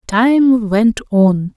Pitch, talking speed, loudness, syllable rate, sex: 225 Hz, 115 wpm, -13 LUFS, 2.1 syllables/s, female